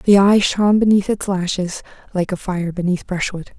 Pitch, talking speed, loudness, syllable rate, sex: 190 Hz, 185 wpm, -18 LUFS, 5.0 syllables/s, female